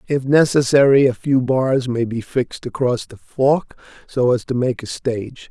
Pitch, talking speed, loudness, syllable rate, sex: 130 Hz, 185 wpm, -18 LUFS, 4.5 syllables/s, male